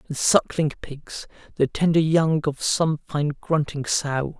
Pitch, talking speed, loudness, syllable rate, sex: 150 Hz, 150 wpm, -22 LUFS, 3.8 syllables/s, male